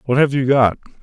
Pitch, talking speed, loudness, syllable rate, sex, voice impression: 130 Hz, 235 wpm, -16 LUFS, 6.0 syllables/s, male, very masculine, slightly old, slightly thick, muffled, cool, sincere, calm, reassuring, slightly elegant